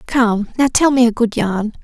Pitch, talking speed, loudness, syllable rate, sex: 235 Hz, 230 wpm, -15 LUFS, 4.5 syllables/s, female